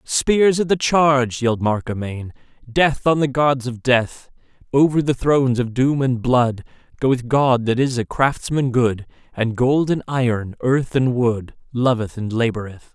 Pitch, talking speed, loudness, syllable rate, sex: 125 Hz, 170 wpm, -19 LUFS, 4.2 syllables/s, male